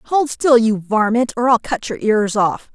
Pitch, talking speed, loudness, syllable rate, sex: 230 Hz, 220 wpm, -16 LUFS, 4.2 syllables/s, female